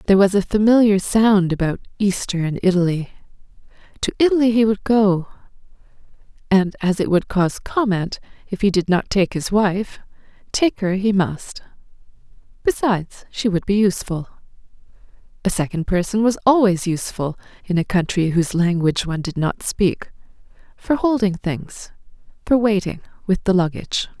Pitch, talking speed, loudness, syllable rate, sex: 195 Hz, 145 wpm, -19 LUFS, 5.2 syllables/s, female